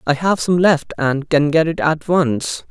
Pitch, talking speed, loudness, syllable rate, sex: 155 Hz, 220 wpm, -17 LUFS, 4.0 syllables/s, male